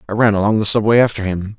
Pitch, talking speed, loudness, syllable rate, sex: 105 Hz, 265 wpm, -15 LUFS, 7.1 syllables/s, male